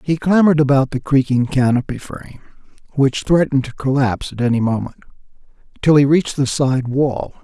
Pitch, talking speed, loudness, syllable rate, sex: 135 Hz, 160 wpm, -16 LUFS, 5.9 syllables/s, male